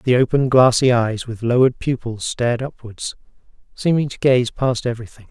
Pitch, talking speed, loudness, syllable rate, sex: 125 Hz, 160 wpm, -18 LUFS, 5.3 syllables/s, male